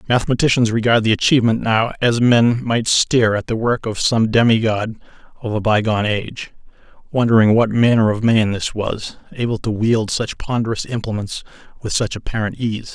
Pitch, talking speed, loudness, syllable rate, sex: 115 Hz, 165 wpm, -17 LUFS, 5.4 syllables/s, male